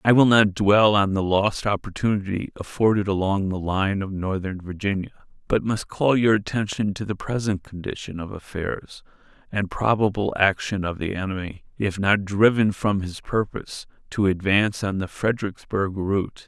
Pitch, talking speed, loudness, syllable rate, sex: 100 Hz, 160 wpm, -23 LUFS, 4.9 syllables/s, male